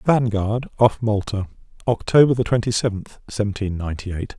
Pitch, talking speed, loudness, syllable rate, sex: 110 Hz, 125 wpm, -21 LUFS, 5.1 syllables/s, male